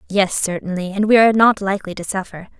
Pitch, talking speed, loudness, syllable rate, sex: 195 Hz, 210 wpm, -17 LUFS, 6.5 syllables/s, female